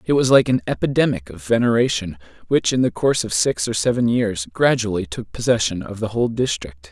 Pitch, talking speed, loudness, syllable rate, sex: 105 Hz, 200 wpm, -19 LUFS, 5.8 syllables/s, male